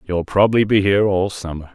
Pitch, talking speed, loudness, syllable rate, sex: 95 Hz, 205 wpm, -17 LUFS, 6.4 syllables/s, male